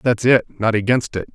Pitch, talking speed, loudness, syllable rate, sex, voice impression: 115 Hz, 180 wpm, -18 LUFS, 5.1 syllables/s, male, very masculine, very adult-like, very middle-aged, very thick, tensed, powerful, slightly dark, hard, clear, very fluent, cool, very intellectual, sincere, calm, very mature, friendly, very reassuring, unique, slightly elegant, very wild, slightly sweet, slightly lively, kind